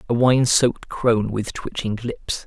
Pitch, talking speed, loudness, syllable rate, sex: 115 Hz, 170 wpm, -21 LUFS, 4.5 syllables/s, male